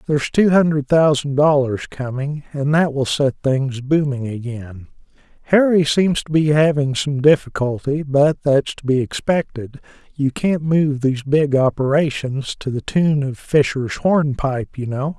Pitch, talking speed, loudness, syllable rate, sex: 140 Hz, 150 wpm, -18 LUFS, 4.3 syllables/s, male